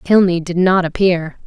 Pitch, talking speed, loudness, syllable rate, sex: 180 Hz, 165 wpm, -15 LUFS, 4.4 syllables/s, female